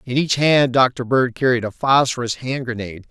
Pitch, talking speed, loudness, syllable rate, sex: 125 Hz, 195 wpm, -18 LUFS, 5.0 syllables/s, male